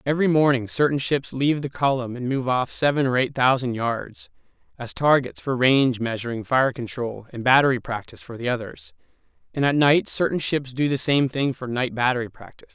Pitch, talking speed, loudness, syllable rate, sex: 130 Hz, 195 wpm, -22 LUFS, 5.6 syllables/s, male